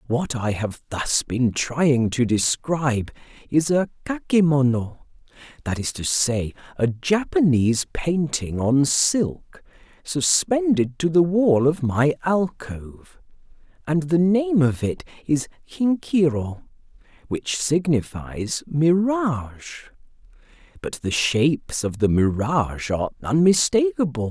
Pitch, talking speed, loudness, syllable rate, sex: 145 Hz, 105 wpm, -21 LUFS, 3.7 syllables/s, male